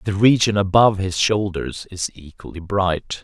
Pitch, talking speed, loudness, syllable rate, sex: 95 Hz, 150 wpm, -19 LUFS, 4.6 syllables/s, male